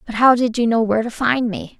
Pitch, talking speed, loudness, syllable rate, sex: 235 Hz, 300 wpm, -17 LUFS, 6.0 syllables/s, female